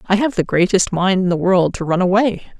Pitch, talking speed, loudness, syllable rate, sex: 190 Hz, 255 wpm, -16 LUFS, 5.5 syllables/s, female